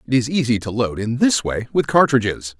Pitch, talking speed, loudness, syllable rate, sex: 120 Hz, 230 wpm, -19 LUFS, 5.4 syllables/s, male